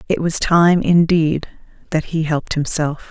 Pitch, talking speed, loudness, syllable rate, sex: 160 Hz, 155 wpm, -17 LUFS, 4.5 syllables/s, female